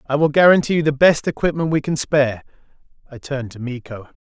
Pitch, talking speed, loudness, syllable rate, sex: 145 Hz, 200 wpm, -18 LUFS, 6.3 syllables/s, male